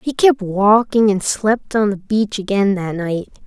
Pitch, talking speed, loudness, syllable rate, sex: 205 Hz, 190 wpm, -17 LUFS, 4.0 syllables/s, female